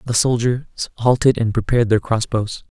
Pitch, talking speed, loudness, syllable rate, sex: 115 Hz, 155 wpm, -18 LUFS, 5.7 syllables/s, male